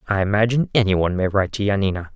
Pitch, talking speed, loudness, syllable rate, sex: 100 Hz, 220 wpm, -20 LUFS, 8.2 syllables/s, male